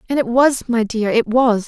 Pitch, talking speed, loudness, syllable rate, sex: 235 Hz, 250 wpm, -16 LUFS, 4.7 syllables/s, female